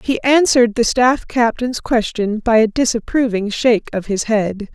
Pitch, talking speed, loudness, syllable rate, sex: 230 Hz, 165 wpm, -16 LUFS, 4.7 syllables/s, female